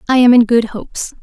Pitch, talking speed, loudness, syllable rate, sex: 235 Hz, 245 wpm, -11 LUFS, 6.0 syllables/s, female